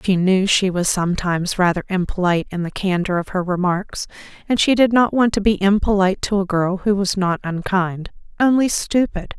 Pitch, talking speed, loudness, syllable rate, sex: 190 Hz, 185 wpm, -18 LUFS, 5.3 syllables/s, female